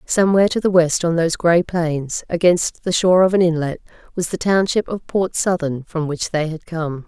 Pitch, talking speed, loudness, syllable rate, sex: 170 Hz, 210 wpm, -18 LUFS, 5.2 syllables/s, female